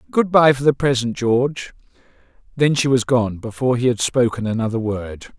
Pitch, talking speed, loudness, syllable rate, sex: 120 Hz, 180 wpm, -18 LUFS, 5.4 syllables/s, male